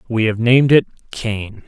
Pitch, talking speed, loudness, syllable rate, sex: 115 Hz, 180 wpm, -16 LUFS, 4.8 syllables/s, male